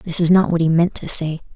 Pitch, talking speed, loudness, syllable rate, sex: 170 Hz, 310 wpm, -17 LUFS, 5.7 syllables/s, female